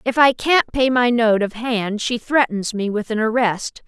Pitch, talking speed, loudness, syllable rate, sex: 230 Hz, 215 wpm, -18 LUFS, 4.4 syllables/s, female